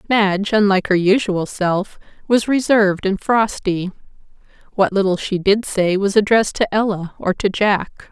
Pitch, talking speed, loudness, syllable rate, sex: 200 Hz, 155 wpm, -17 LUFS, 4.8 syllables/s, female